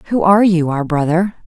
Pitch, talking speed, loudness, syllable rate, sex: 175 Hz, 200 wpm, -14 LUFS, 5.9 syllables/s, female